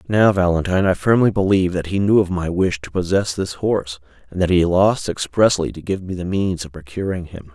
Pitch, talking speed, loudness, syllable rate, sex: 90 Hz, 225 wpm, -19 LUFS, 5.7 syllables/s, male